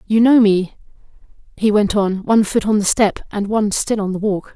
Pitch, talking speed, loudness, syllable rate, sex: 210 Hz, 225 wpm, -16 LUFS, 5.3 syllables/s, female